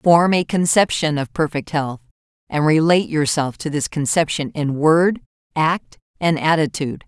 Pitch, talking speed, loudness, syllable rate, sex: 155 Hz, 145 wpm, -19 LUFS, 4.7 syllables/s, female